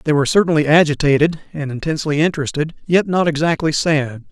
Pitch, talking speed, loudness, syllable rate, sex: 155 Hz, 155 wpm, -17 LUFS, 6.4 syllables/s, male